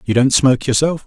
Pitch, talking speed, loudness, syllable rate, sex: 135 Hz, 225 wpm, -14 LUFS, 6.2 syllables/s, male